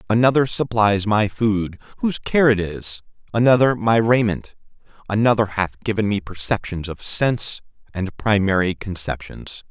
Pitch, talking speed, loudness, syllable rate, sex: 110 Hz, 130 wpm, -20 LUFS, 4.7 syllables/s, male